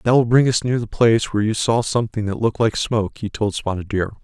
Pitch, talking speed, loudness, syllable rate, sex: 110 Hz, 270 wpm, -19 LUFS, 6.4 syllables/s, male